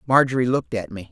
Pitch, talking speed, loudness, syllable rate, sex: 115 Hz, 215 wpm, -21 LUFS, 7.2 syllables/s, male